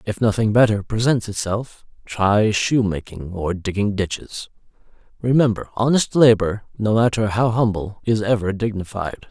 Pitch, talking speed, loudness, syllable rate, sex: 105 Hz, 130 wpm, -20 LUFS, 4.6 syllables/s, male